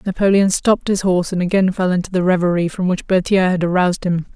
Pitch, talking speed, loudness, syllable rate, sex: 185 Hz, 220 wpm, -17 LUFS, 6.5 syllables/s, female